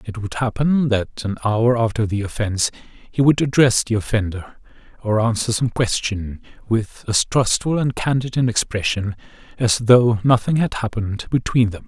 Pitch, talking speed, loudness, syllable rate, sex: 115 Hz, 160 wpm, -19 LUFS, 4.9 syllables/s, male